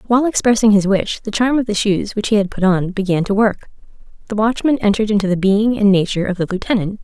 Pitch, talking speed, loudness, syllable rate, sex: 205 Hz, 240 wpm, -16 LUFS, 6.5 syllables/s, female